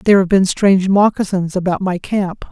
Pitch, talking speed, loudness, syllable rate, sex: 190 Hz, 190 wpm, -15 LUFS, 5.3 syllables/s, female